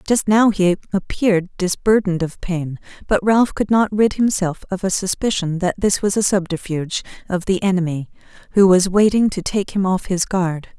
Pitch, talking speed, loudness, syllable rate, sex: 190 Hz, 185 wpm, -18 LUFS, 5.0 syllables/s, female